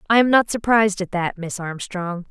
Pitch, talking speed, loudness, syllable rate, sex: 195 Hz, 210 wpm, -20 LUFS, 5.2 syllables/s, female